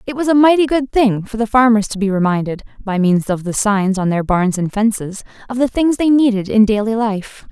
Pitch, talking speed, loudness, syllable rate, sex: 220 Hz, 240 wpm, -15 LUFS, 5.4 syllables/s, female